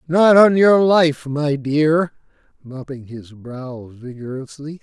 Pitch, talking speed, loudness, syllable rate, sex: 145 Hz, 125 wpm, -15 LUFS, 3.4 syllables/s, male